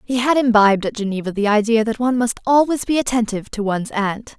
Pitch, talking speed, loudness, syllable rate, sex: 225 Hz, 220 wpm, -18 LUFS, 6.4 syllables/s, female